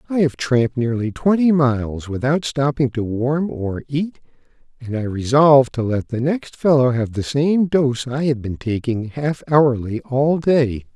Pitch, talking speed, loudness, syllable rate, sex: 135 Hz, 175 wpm, -19 LUFS, 4.3 syllables/s, male